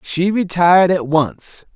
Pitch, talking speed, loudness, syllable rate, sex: 170 Hz, 135 wpm, -15 LUFS, 3.8 syllables/s, male